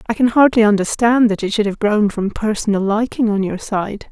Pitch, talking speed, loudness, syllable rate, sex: 215 Hz, 220 wpm, -16 LUFS, 5.4 syllables/s, female